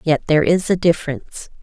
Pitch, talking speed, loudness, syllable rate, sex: 160 Hz, 185 wpm, -17 LUFS, 6.6 syllables/s, female